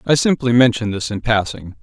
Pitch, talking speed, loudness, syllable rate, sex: 115 Hz, 195 wpm, -17 LUFS, 5.3 syllables/s, male